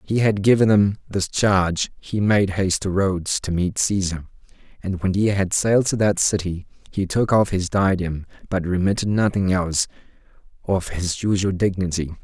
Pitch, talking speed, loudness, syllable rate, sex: 95 Hz, 175 wpm, -21 LUFS, 5.1 syllables/s, male